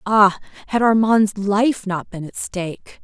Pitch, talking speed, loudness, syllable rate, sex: 205 Hz, 160 wpm, -19 LUFS, 3.9 syllables/s, female